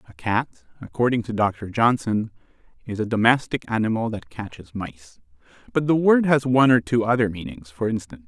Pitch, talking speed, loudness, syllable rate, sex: 115 Hz, 175 wpm, -22 LUFS, 5.4 syllables/s, male